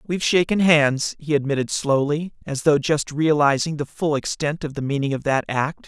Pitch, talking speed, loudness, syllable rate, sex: 150 Hz, 195 wpm, -21 LUFS, 5.1 syllables/s, male